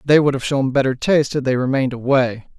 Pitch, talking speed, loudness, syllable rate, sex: 135 Hz, 230 wpm, -18 LUFS, 6.3 syllables/s, male